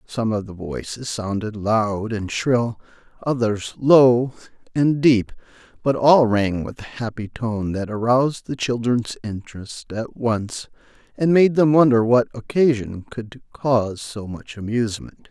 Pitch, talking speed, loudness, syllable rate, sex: 115 Hz, 145 wpm, -20 LUFS, 4.0 syllables/s, male